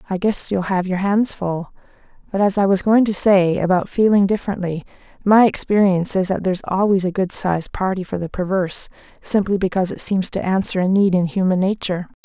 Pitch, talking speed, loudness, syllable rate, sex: 190 Hz, 200 wpm, -18 LUFS, 5.9 syllables/s, female